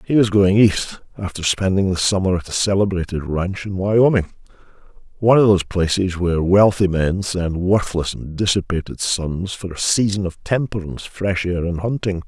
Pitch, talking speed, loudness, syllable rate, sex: 95 Hz, 165 wpm, -19 LUFS, 5.1 syllables/s, male